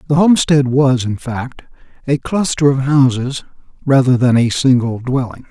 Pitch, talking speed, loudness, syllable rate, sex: 135 Hz, 155 wpm, -14 LUFS, 4.7 syllables/s, male